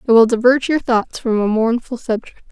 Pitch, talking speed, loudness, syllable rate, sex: 235 Hz, 215 wpm, -16 LUFS, 5.2 syllables/s, female